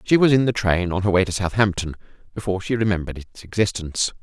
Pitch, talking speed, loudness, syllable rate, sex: 100 Hz, 215 wpm, -21 LUFS, 6.8 syllables/s, male